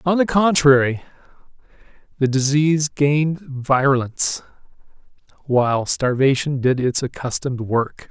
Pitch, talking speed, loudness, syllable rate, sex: 140 Hz, 95 wpm, -18 LUFS, 4.7 syllables/s, male